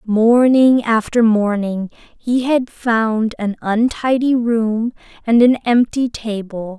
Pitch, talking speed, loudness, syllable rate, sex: 230 Hz, 115 wpm, -16 LUFS, 3.3 syllables/s, female